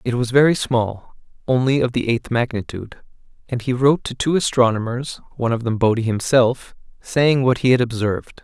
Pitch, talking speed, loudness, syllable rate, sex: 125 Hz, 180 wpm, -19 LUFS, 4.9 syllables/s, male